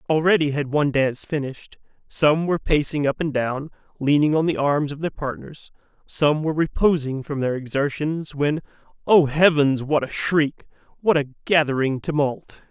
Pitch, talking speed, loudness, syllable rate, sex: 150 Hz, 155 wpm, -21 LUFS, 5.0 syllables/s, male